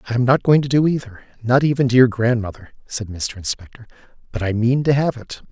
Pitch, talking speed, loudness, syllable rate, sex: 120 Hz, 230 wpm, -18 LUFS, 5.9 syllables/s, male